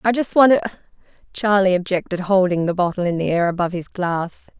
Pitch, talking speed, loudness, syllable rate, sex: 185 Hz, 195 wpm, -19 LUFS, 6.1 syllables/s, female